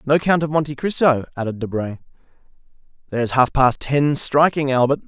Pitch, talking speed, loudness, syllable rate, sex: 135 Hz, 165 wpm, -19 LUFS, 5.7 syllables/s, male